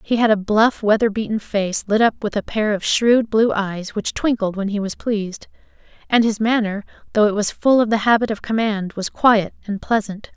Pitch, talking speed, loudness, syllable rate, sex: 215 Hz, 220 wpm, -19 LUFS, 5.0 syllables/s, female